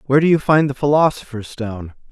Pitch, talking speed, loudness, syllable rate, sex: 135 Hz, 200 wpm, -17 LUFS, 6.6 syllables/s, male